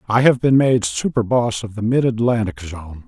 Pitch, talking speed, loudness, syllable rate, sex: 115 Hz, 195 wpm, -18 LUFS, 4.8 syllables/s, male